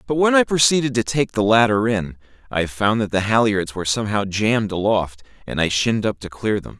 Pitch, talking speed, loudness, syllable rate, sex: 110 Hz, 220 wpm, -19 LUFS, 5.7 syllables/s, male